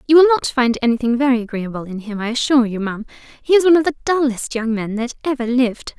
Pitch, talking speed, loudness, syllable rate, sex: 250 Hz, 240 wpm, -18 LUFS, 6.8 syllables/s, female